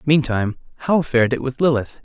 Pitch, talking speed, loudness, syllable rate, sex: 130 Hz, 175 wpm, -19 LUFS, 6.1 syllables/s, male